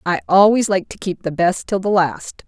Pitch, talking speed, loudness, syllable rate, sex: 185 Hz, 245 wpm, -17 LUFS, 4.9 syllables/s, female